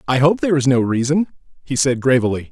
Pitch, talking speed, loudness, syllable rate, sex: 135 Hz, 215 wpm, -17 LUFS, 6.4 syllables/s, male